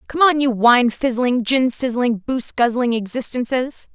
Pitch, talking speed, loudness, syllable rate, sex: 245 Hz, 105 wpm, -18 LUFS, 4.8 syllables/s, female